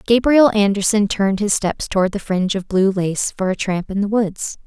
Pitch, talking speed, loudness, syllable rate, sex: 200 Hz, 220 wpm, -18 LUFS, 5.2 syllables/s, female